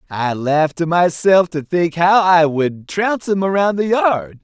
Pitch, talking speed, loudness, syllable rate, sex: 170 Hz, 190 wpm, -16 LUFS, 4.3 syllables/s, male